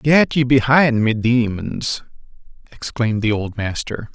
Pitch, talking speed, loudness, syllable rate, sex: 120 Hz, 130 wpm, -18 LUFS, 4.1 syllables/s, male